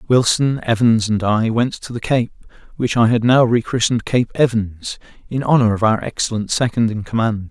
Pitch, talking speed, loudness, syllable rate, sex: 115 Hz, 185 wpm, -17 LUFS, 5.1 syllables/s, male